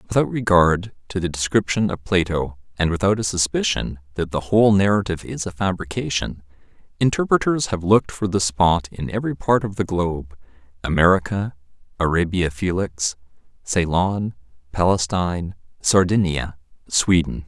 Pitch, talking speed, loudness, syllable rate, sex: 90 Hz, 125 wpm, -21 LUFS, 5.1 syllables/s, male